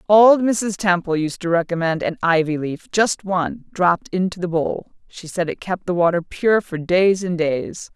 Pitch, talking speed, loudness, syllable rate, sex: 180 Hz, 180 wpm, -19 LUFS, 4.6 syllables/s, female